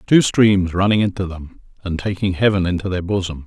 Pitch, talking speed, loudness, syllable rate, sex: 95 Hz, 190 wpm, -18 LUFS, 5.5 syllables/s, male